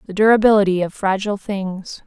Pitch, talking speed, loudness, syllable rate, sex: 200 Hz, 145 wpm, -17 LUFS, 5.8 syllables/s, female